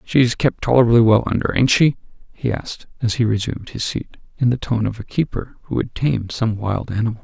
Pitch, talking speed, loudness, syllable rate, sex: 115 Hz, 215 wpm, -19 LUFS, 5.9 syllables/s, male